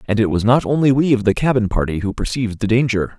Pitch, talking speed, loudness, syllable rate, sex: 115 Hz, 265 wpm, -17 LUFS, 6.5 syllables/s, male